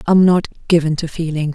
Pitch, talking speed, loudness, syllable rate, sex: 165 Hz, 195 wpm, -16 LUFS, 5.5 syllables/s, female